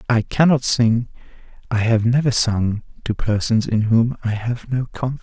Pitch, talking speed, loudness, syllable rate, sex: 115 Hz, 170 wpm, -19 LUFS, 5.1 syllables/s, male